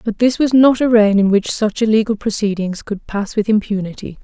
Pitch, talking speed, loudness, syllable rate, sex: 215 Hz, 210 wpm, -16 LUFS, 5.3 syllables/s, female